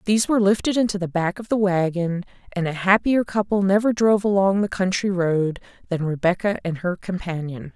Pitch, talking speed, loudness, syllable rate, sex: 190 Hz, 185 wpm, -21 LUFS, 5.6 syllables/s, female